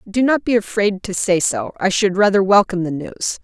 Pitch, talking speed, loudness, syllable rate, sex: 195 Hz, 225 wpm, -17 LUFS, 5.3 syllables/s, female